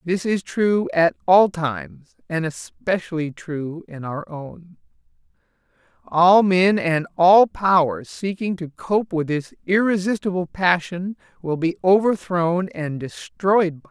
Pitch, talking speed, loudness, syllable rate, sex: 175 Hz, 135 wpm, -20 LUFS, 3.8 syllables/s, male